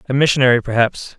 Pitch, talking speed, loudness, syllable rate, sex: 130 Hz, 150 wpm, -15 LUFS, 6.9 syllables/s, male